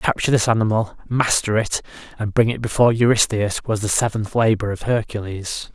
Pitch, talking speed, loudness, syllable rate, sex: 110 Hz, 180 wpm, -20 LUFS, 5.8 syllables/s, male